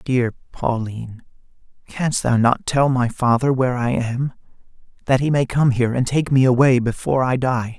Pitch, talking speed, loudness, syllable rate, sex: 125 Hz, 175 wpm, -19 LUFS, 5.0 syllables/s, male